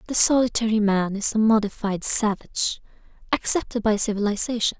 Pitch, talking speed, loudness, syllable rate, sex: 215 Hz, 125 wpm, -21 LUFS, 5.6 syllables/s, female